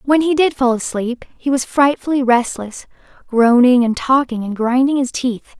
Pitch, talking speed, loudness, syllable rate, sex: 255 Hz, 170 wpm, -16 LUFS, 4.6 syllables/s, female